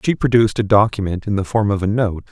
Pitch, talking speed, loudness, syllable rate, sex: 105 Hz, 260 wpm, -17 LUFS, 6.4 syllables/s, male